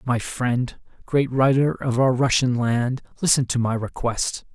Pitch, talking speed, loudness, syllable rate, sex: 125 Hz, 145 wpm, -22 LUFS, 4.1 syllables/s, male